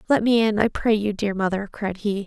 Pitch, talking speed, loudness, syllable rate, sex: 205 Hz, 265 wpm, -22 LUFS, 5.4 syllables/s, female